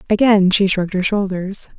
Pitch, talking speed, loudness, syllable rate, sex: 195 Hz, 170 wpm, -16 LUFS, 5.3 syllables/s, female